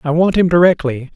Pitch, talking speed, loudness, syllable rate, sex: 165 Hz, 210 wpm, -14 LUFS, 5.8 syllables/s, male